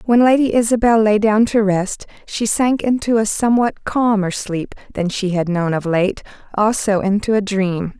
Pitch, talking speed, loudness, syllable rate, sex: 210 Hz, 180 wpm, -17 LUFS, 4.6 syllables/s, female